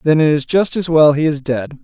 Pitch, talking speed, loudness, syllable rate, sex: 150 Hz, 295 wpm, -15 LUFS, 5.3 syllables/s, male